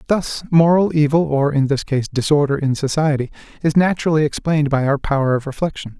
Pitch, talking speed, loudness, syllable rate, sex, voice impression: 145 Hz, 180 wpm, -17 LUFS, 6.0 syllables/s, male, masculine, adult-like, slightly muffled, sincere, slightly calm, slightly sweet, kind